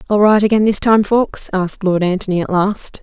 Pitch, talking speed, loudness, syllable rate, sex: 200 Hz, 220 wpm, -15 LUFS, 5.7 syllables/s, female